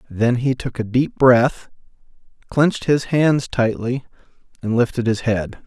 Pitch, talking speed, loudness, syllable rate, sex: 125 Hz, 150 wpm, -19 LUFS, 4.2 syllables/s, male